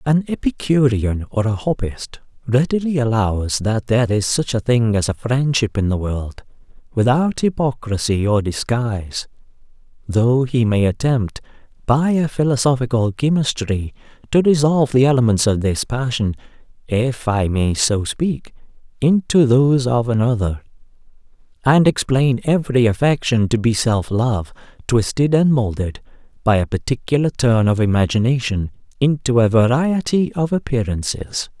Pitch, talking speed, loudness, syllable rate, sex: 120 Hz, 130 wpm, -18 LUFS, 4.6 syllables/s, male